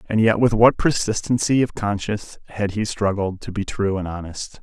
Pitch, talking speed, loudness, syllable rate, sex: 105 Hz, 195 wpm, -21 LUFS, 5.1 syllables/s, male